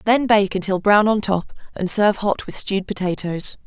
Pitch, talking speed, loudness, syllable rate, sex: 200 Hz, 195 wpm, -19 LUFS, 5.2 syllables/s, female